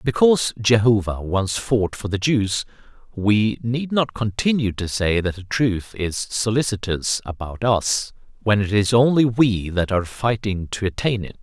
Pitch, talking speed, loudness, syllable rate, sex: 110 Hz, 165 wpm, -20 LUFS, 4.4 syllables/s, male